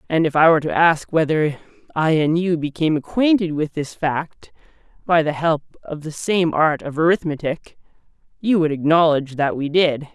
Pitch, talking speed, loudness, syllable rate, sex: 155 Hz, 175 wpm, -19 LUFS, 5.1 syllables/s, male